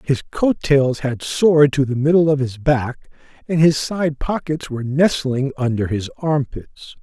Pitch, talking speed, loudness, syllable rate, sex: 140 Hz, 170 wpm, -18 LUFS, 4.5 syllables/s, male